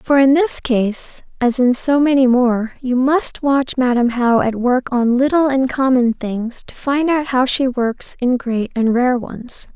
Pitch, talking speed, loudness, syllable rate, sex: 255 Hz, 195 wpm, -16 LUFS, 3.9 syllables/s, female